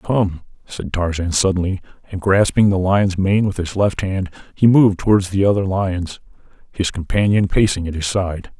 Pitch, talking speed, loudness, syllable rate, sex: 95 Hz, 175 wpm, -18 LUFS, 4.8 syllables/s, male